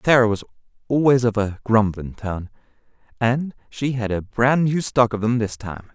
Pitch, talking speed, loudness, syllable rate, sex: 115 Hz, 180 wpm, -21 LUFS, 4.7 syllables/s, male